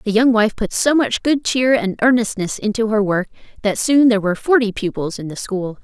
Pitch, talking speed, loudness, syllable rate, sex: 220 Hz, 225 wpm, -17 LUFS, 5.5 syllables/s, female